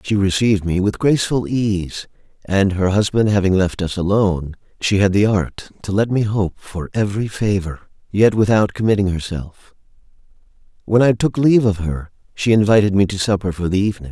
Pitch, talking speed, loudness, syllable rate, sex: 100 Hz, 180 wpm, -17 LUFS, 5.5 syllables/s, male